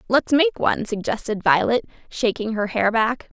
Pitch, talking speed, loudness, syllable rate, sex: 230 Hz, 160 wpm, -21 LUFS, 5.0 syllables/s, female